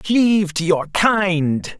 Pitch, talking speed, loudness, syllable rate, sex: 180 Hz, 135 wpm, -17 LUFS, 2.9 syllables/s, male